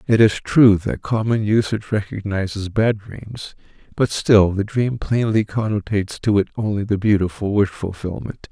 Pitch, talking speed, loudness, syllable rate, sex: 105 Hz, 155 wpm, -19 LUFS, 4.8 syllables/s, male